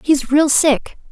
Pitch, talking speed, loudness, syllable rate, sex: 285 Hz, 160 wpm, -15 LUFS, 3.3 syllables/s, female